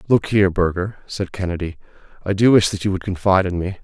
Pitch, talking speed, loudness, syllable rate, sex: 95 Hz, 220 wpm, -19 LUFS, 6.5 syllables/s, male